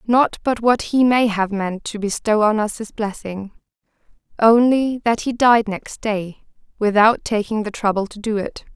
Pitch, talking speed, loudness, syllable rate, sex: 215 Hz, 180 wpm, -19 LUFS, 4.4 syllables/s, female